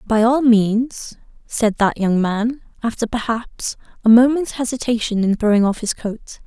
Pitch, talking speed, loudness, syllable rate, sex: 230 Hz, 160 wpm, -18 LUFS, 4.5 syllables/s, female